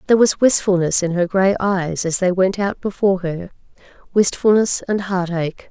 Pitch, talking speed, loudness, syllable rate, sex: 185 Hz, 170 wpm, -18 LUFS, 5.1 syllables/s, female